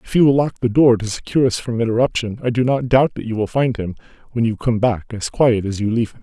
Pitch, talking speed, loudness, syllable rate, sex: 120 Hz, 290 wpm, -18 LUFS, 6.5 syllables/s, male